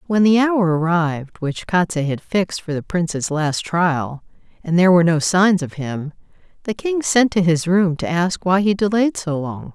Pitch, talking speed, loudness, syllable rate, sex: 175 Hz, 205 wpm, -18 LUFS, 4.7 syllables/s, female